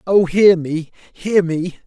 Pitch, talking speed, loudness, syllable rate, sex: 175 Hz, 160 wpm, -16 LUFS, 3.2 syllables/s, male